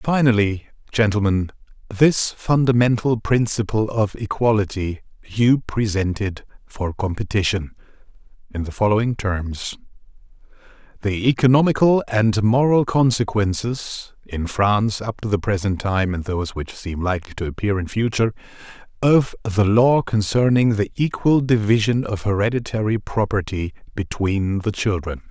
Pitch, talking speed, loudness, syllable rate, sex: 105 Hz, 115 wpm, -20 LUFS, 4.6 syllables/s, male